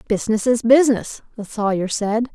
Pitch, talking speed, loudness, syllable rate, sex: 225 Hz, 155 wpm, -18 LUFS, 5.5 syllables/s, female